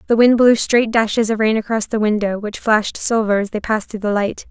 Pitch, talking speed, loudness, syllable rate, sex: 220 Hz, 255 wpm, -17 LUFS, 5.8 syllables/s, female